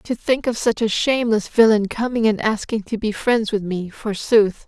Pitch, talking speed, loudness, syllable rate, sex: 220 Hz, 205 wpm, -19 LUFS, 4.8 syllables/s, female